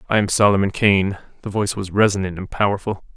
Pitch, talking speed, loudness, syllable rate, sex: 100 Hz, 190 wpm, -19 LUFS, 6.4 syllables/s, male